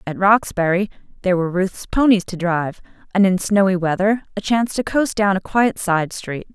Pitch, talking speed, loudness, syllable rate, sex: 195 Hz, 195 wpm, -19 LUFS, 5.4 syllables/s, female